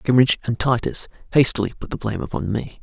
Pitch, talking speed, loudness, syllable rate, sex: 125 Hz, 190 wpm, -21 LUFS, 7.2 syllables/s, male